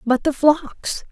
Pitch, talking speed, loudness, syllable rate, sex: 275 Hz, 160 wpm, -19 LUFS, 3.1 syllables/s, female